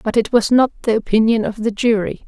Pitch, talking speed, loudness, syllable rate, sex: 225 Hz, 240 wpm, -16 LUFS, 6.0 syllables/s, female